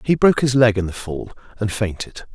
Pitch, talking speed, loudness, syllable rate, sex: 110 Hz, 230 wpm, -19 LUFS, 5.6 syllables/s, male